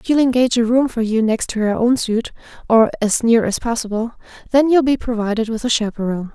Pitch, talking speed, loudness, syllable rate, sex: 230 Hz, 215 wpm, -17 LUFS, 5.9 syllables/s, female